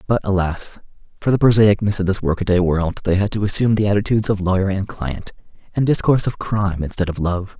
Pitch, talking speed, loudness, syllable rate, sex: 100 Hz, 205 wpm, -19 LUFS, 6.4 syllables/s, male